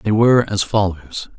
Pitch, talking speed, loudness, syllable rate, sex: 100 Hz, 175 wpm, -16 LUFS, 4.7 syllables/s, male